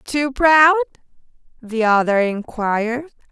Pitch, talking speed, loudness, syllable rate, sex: 255 Hz, 90 wpm, -17 LUFS, 3.5 syllables/s, female